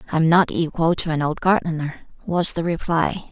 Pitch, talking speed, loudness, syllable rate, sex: 165 Hz, 200 wpm, -20 LUFS, 5.2 syllables/s, female